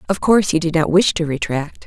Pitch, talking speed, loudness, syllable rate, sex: 170 Hz, 260 wpm, -17 LUFS, 5.9 syllables/s, female